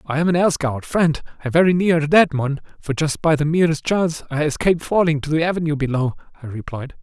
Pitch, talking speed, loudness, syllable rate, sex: 155 Hz, 230 wpm, -19 LUFS, 6.2 syllables/s, male